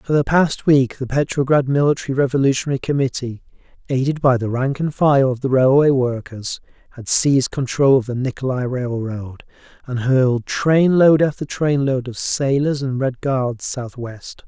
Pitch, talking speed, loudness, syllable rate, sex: 135 Hz, 155 wpm, -18 LUFS, 4.8 syllables/s, male